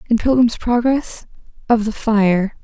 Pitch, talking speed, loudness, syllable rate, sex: 225 Hz, 115 wpm, -17 LUFS, 4.0 syllables/s, female